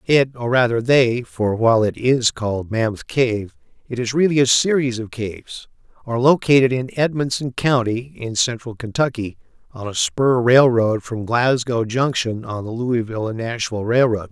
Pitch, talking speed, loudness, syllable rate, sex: 120 Hz, 165 wpm, -19 LUFS, 4.8 syllables/s, male